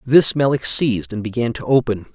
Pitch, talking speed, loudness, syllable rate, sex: 125 Hz, 195 wpm, -18 LUFS, 5.5 syllables/s, male